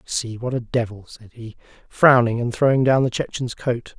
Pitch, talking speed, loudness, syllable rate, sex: 120 Hz, 195 wpm, -20 LUFS, 4.9 syllables/s, male